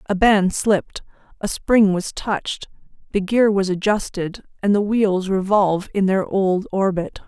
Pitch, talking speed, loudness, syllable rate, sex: 195 Hz, 155 wpm, -19 LUFS, 4.4 syllables/s, female